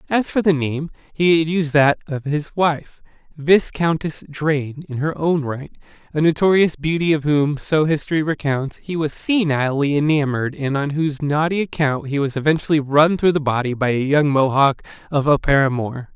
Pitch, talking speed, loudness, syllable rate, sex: 150 Hz, 175 wpm, -19 LUFS, 5.1 syllables/s, male